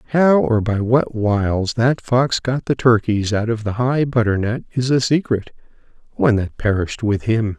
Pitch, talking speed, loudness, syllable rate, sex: 115 Hz, 175 wpm, -18 LUFS, 4.7 syllables/s, male